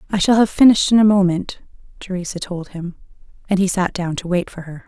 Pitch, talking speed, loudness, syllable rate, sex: 185 Hz, 220 wpm, -17 LUFS, 6.1 syllables/s, female